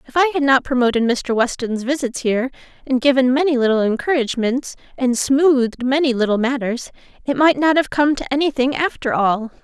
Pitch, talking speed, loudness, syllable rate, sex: 260 Hz, 180 wpm, -18 LUFS, 5.7 syllables/s, female